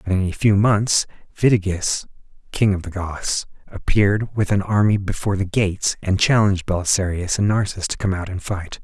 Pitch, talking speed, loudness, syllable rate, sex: 100 Hz, 190 wpm, -20 LUFS, 5.3 syllables/s, male